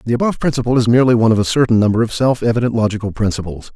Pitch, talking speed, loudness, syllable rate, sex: 115 Hz, 240 wpm, -15 LUFS, 8.4 syllables/s, male